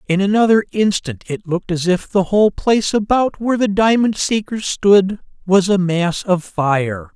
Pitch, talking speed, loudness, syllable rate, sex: 190 Hz, 175 wpm, -16 LUFS, 4.7 syllables/s, male